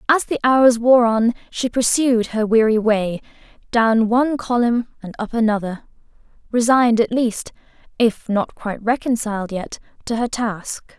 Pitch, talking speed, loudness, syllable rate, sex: 230 Hz, 145 wpm, -18 LUFS, 3.8 syllables/s, female